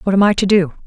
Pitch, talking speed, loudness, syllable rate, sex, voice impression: 190 Hz, 345 wpm, -14 LUFS, 7.5 syllables/s, female, very feminine, slightly young, slightly adult-like, slightly thin, tensed, powerful, bright, slightly soft, clear, fluent, slightly raspy, very cool, intellectual, very refreshing, slightly sincere, slightly calm, friendly, reassuring, unique, slightly elegant, very wild, slightly sweet, very lively, slightly strict, slightly intense